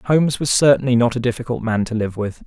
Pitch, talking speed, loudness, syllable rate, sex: 120 Hz, 245 wpm, -18 LUFS, 6.2 syllables/s, male